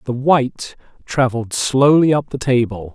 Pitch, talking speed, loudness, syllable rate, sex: 130 Hz, 145 wpm, -16 LUFS, 4.7 syllables/s, male